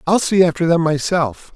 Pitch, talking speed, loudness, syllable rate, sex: 165 Hz, 195 wpm, -16 LUFS, 5.0 syllables/s, male